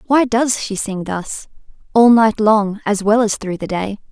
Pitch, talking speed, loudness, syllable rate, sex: 210 Hz, 205 wpm, -16 LUFS, 4.2 syllables/s, female